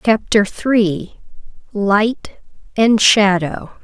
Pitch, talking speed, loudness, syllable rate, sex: 205 Hz, 65 wpm, -15 LUFS, 2.5 syllables/s, female